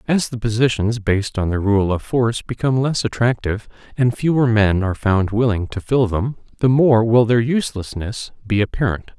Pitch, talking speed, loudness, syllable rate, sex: 115 Hz, 185 wpm, -18 LUFS, 5.4 syllables/s, male